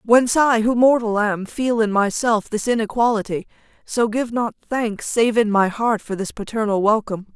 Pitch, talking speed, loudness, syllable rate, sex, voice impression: 220 Hz, 180 wpm, -19 LUFS, 4.9 syllables/s, female, feminine, adult-like, powerful, clear, slightly raspy, intellectual, slightly wild, lively, strict, intense, sharp